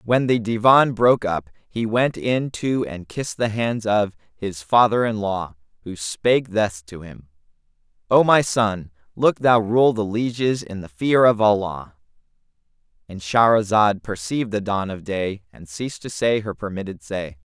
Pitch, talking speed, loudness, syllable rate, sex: 105 Hz, 170 wpm, -20 LUFS, 4.4 syllables/s, male